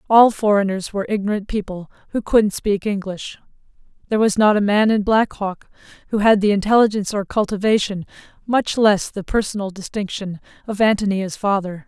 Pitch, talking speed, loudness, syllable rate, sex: 205 Hz, 160 wpm, -19 LUFS, 5.6 syllables/s, female